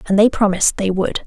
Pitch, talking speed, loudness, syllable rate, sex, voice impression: 200 Hz, 235 wpm, -16 LUFS, 6.7 syllables/s, female, feminine, slightly young, slightly dark, slightly muffled, fluent, slightly cute, calm, slightly friendly, kind